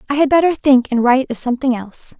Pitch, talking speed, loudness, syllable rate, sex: 260 Hz, 245 wpm, -15 LUFS, 7.1 syllables/s, female